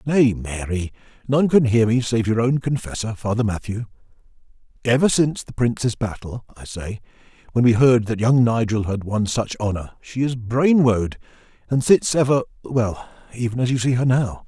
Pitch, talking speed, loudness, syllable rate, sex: 115 Hz, 175 wpm, -20 LUFS, 5.0 syllables/s, male